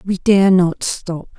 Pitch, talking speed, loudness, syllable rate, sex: 185 Hz, 175 wpm, -15 LUFS, 3.3 syllables/s, female